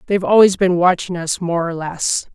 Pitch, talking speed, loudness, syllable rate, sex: 175 Hz, 205 wpm, -16 LUFS, 5.2 syllables/s, female